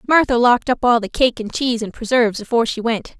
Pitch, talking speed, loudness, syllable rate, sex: 235 Hz, 245 wpm, -17 LUFS, 6.7 syllables/s, female